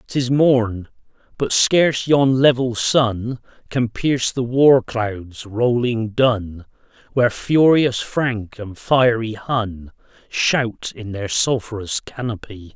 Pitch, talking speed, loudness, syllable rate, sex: 120 Hz, 120 wpm, -18 LUFS, 3.3 syllables/s, male